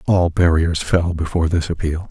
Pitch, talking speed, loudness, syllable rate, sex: 85 Hz, 170 wpm, -18 LUFS, 5.0 syllables/s, male